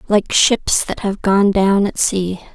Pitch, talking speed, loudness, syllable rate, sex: 195 Hz, 190 wpm, -16 LUFS, 3.6 syllables/s, female